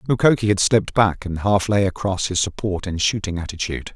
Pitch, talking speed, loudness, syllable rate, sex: 100 Hz, 195 wpm, -20 LUFS, 5.8 syllables/s, male